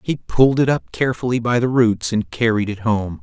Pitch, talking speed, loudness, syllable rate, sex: 115 Hz, 225 wpm, -18 LUFS, 5.4 syllables/s, male